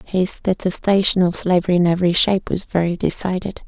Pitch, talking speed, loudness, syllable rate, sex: 180 Hz, 165 wpm, -18 LUFS, 5.9 syllables/s, female